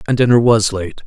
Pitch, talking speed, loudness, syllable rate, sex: 110 Hz, 225 wpm, -13 LUFS, 5.9 syllables/s, male